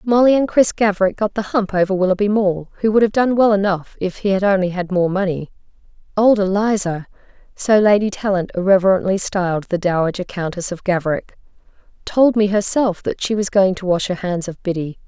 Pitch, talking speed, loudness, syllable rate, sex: 195 Hz, 180 wpm, -17 LUFS, 6.0 syllables/s, female